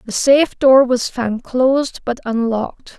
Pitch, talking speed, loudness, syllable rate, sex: 250 Hz, 160 wpm, -16 LUFS, 4.4 syllables/s, female